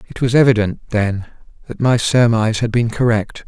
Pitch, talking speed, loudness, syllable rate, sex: 115 Hz, 175 wpm, -16 LUFS, 5.2 syllables/s, male